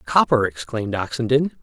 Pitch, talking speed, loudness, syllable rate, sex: 130 Hz, 110 wpm, -21 LUFS, 5.4 syllables/s, male